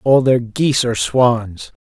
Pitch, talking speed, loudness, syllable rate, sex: 130 Hz, 160 wpm, -16 LUFS, 4.2 syllables/s, female